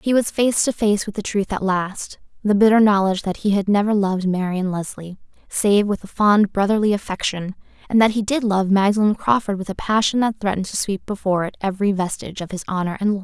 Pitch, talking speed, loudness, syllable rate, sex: 200 Hz, 220 wpm, -20 LUFS, 6.1 syllables/s, female